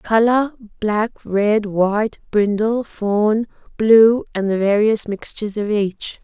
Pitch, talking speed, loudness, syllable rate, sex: 215 Hz, 115 wpm, -18 LUFS, 3.5 syllables/s, female